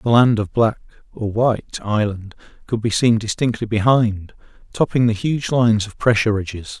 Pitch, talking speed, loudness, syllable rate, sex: 110 Hz, 170 wpm, -19 LUFS, 5.1 syllables/s, male